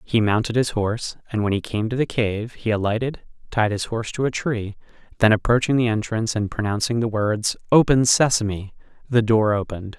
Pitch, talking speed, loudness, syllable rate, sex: 110 Hz, 190 wpm, -21 LUFS, 5.6 syllables/s, male